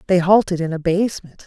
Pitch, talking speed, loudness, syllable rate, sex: 180 Hz, 165 wpm, -18 LUFS, 6.2 syllables/s, female